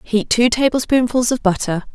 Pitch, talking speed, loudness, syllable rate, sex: 235 Hz, 155 wpm, -17 LUFS, 5.0 syllables/s, female